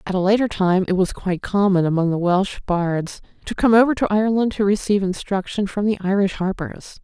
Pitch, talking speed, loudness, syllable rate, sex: 195 Hz, 205 wpm, -19 LUFS, 5.7 syllables/s, female